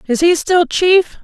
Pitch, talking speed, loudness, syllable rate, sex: 335 Hz, 195 wpm, -13 LUFS, 3.8 syllables/s, female